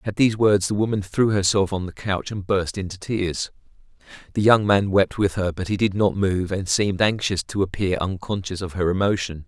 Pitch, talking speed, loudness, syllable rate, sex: 95 Hz, 215 wpm, -22 LUFS, 5.3 syllables/s, male